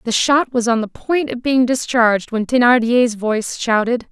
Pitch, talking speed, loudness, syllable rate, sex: 240 Hz, 190 wpm, -16 LUFS, 4.8 syllables/s, female